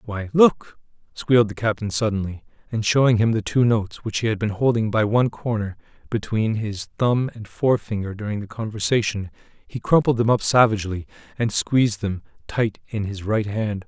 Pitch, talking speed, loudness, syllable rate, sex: 110 Hz, 175 wpm, -22 LUFS, 5.3 syllables/s, male